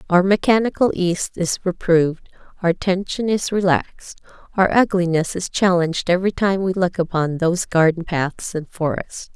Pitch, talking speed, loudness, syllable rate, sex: 180 Hz, 150 wpm, -19 LUFS, 4.9 syllables/s, female